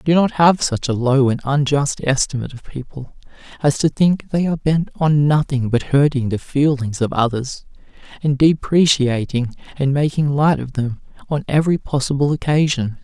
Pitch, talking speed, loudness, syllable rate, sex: 140 Hz, 165 wpm, -18 LUFS, 4.9 syllables/s, male